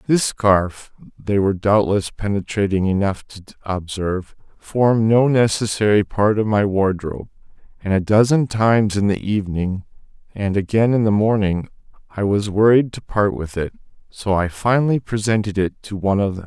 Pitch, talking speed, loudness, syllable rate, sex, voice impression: 100 Hz, 160 wpm, -19 LUFS, 5.1 syllables/s, male, very masculine, adult-like, middle-aged, slightly thick, slightly tensed, slightly weak, bright, soft, clear, slightly fluent, very cute, very cool, intellectual, very sincere, very calm, very mature, very friendly, reassuring, very unique, elegant, sweet, lively, very kind